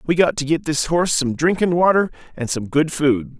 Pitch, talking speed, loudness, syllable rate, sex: 155 Hz, 210 wpm, -19 LUFS, 5.4 syllables/s, male